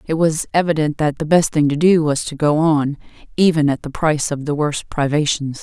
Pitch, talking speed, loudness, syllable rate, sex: 150 Hz, 225 wpm, -17 LUFS, 5.3 syllables/s, female